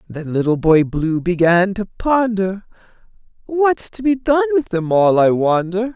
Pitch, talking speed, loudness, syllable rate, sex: 200 Hz, 160 wpm, -17 LUFS, 4.2 syllables/s, male